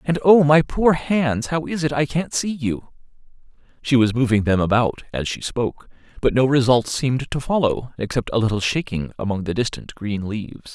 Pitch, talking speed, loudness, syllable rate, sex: 130 Hz, 195 wpm, -20 LUFS, 5.1 syllables/s, male